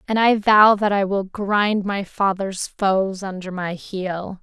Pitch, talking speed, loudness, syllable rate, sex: 195 Hz, 175 wpm, -20 LUFS, 3.6 syllables/s, female